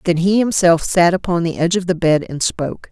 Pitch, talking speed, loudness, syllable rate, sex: 175 Hz, 245 wpm, -16 LUFS, 5.8 syllables/s, female